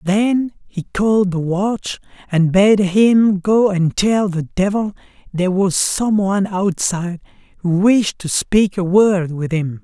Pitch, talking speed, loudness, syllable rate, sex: 195 Hz, 160 wpm, -16 LUFS, 3.8 syllables/s, male